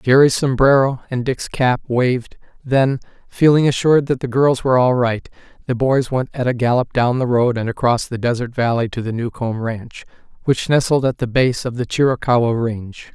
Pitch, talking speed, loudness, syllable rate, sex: 125 Hz, 190 wpm, -17 LUFS, 5.2 syllables/s, male